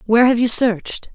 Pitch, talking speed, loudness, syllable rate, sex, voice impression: 230 Hz, 210 wpm, -15 LUFS, 6.0 syllables/s, female, feminine, slightly adult-like, powerful, fluent, slightly intellectual, slightly sharp